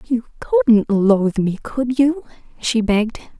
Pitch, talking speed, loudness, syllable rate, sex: 225 Hz, 140 wpm, -18 LUFS, 4.3 syllables/s, female